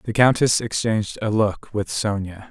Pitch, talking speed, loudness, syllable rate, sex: 105 Hz, 170 wpm, -21 LUFS, 4.8 syllables/s, male